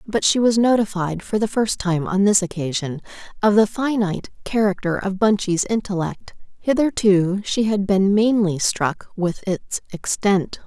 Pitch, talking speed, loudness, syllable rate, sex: 200 Hz, 150 wpm, -20 LUFS, 4.4 syllables/s, female